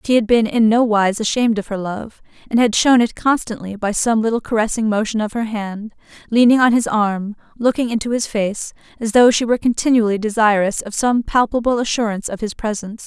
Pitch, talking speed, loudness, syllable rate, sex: 220 Hz, 200 wpm, -17 LUFS, 5.8 syllables/s, female